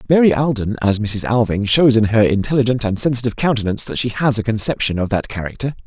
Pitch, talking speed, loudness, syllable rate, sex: 115 Hz, 205 wpm, -17 LUFS, 6.5 syllables/s, male